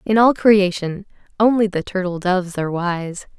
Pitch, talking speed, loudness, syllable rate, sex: 190 Hz, 160 wpm, -18 LUFS, 4.9 syllables/s, female